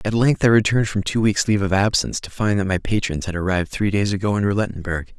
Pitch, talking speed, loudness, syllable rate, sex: 100 Hz, 255 wpm, -20 LUFS, 6.7 syllables/s, male